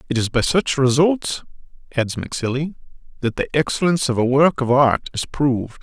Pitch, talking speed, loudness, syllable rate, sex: 135 Hz, 175 wpm, -19 LUFS, 5.3 syllables/s, male